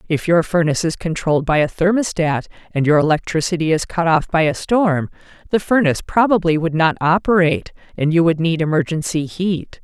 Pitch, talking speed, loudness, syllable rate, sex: 165 Hz, 175 wpm, -17 LUFS, 5.7 syllables/s, female